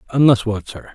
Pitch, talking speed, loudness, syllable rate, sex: 115 Hz, 190 wpm, -17 LUFS, 5.6 syllables/s, male